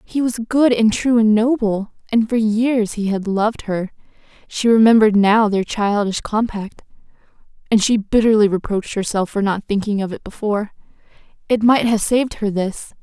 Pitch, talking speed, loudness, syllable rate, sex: 215 Hz, 160 wpm, -17 LUFS, 5.1 syllables/s, female